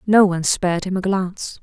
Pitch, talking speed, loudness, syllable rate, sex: 185 Hz, 220 wpm, -19 LUFS, 6.0 syllables/s, female